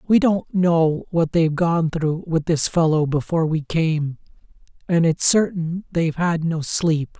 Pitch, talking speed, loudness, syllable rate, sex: 165 Hz, 165 wpm, -20 LUFS, 4.2 syllables/s, male